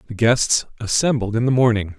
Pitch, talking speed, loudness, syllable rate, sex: 115 Hz, 180 wpm, -18 LUFS, 5.4 syllables/s, male